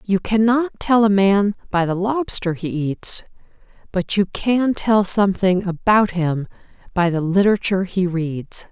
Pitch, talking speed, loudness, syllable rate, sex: 195 Hz, 150 wpm, -19 LUFS, 4.3 syllables/s, female